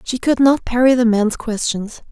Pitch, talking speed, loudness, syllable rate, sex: 240 Hz, 200 wpm, -16 LUFS, 4.6 syllables/s, female